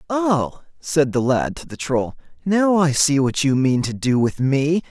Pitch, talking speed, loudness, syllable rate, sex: 145 Hz, 210 wpm, -19 LUFS, 4.0 syllables/s, male